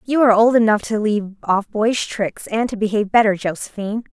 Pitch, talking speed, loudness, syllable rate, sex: 215 Hz, 200 wpm, -18 LUFS, 5.9 syllables/s, female